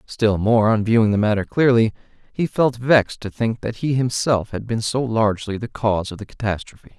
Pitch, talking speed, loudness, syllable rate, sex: 110 Hz, 205 wpm, -20 LUFS, 5.5 syllables/s, male